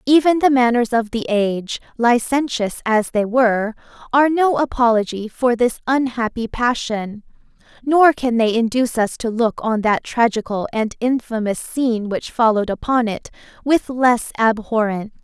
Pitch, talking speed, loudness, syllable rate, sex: 235 Hz, 145 wpm, -18 LUFS, 4.8 syllables/s, female